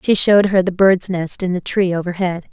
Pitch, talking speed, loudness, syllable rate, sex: 185 Hz, 240 wpm, -16 LUFS, 5.5 syllables/s, female